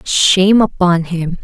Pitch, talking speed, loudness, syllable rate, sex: 180 Hz, 125 wpm, -12 LUFS, 3.8 syllables/s, female